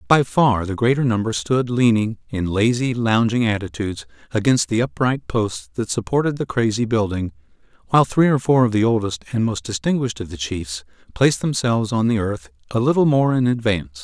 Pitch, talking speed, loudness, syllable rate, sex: 115 Hz, 185 wpm, -20 LUFS, 5.5 syllables/s, male